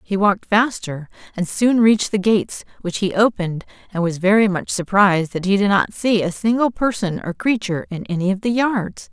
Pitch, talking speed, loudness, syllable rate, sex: 200 Hz, 205 wpm, -19 LUFS, 5.5 syllables/s, female